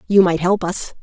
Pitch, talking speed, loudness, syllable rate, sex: 185 Hz, 235 wpm, -17 LUFS, 4.9 syllables/s, female